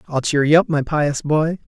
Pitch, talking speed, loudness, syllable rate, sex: 150 Hz, 240 wpm, -18 LUFS, 4.7 syllables/s, male